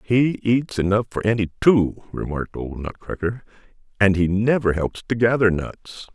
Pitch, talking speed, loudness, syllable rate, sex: 105 Hz, 155 wpm, -21 LUFS, 4.7 syllables/s, male